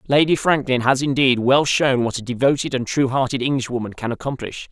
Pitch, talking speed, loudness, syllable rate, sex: 130 Hz, 205 wpm, -19 LUFS, 5.7 syllables/s, male